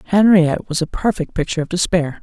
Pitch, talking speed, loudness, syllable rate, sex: 170 Hz, 190 wpm, -17 LUFS, 6.5 syllables/s, female